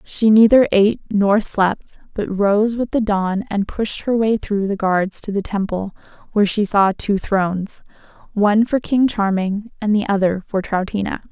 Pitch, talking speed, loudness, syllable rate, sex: 205 Hz, 180 wpm, -18 LUFS, 4.5 syllables/s, female